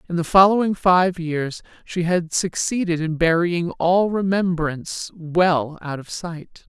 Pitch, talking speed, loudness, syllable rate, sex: 170 Hz, 140 wpm, -20 LUFS, 3.9 syllables/s, female